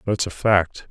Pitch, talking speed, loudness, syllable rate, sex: 95 Hz, 200 wpm, -20 LUFS, 3.9 syllables/s, male